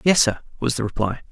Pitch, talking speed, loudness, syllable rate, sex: 125 Hz, 230 wpm, -22 LUFS, 6.4 syllables/s, male